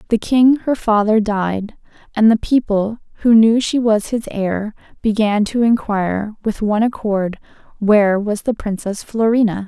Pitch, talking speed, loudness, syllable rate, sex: 215 Hz, 155 wpm, -17 LUFS, 4.5 syllables/s, female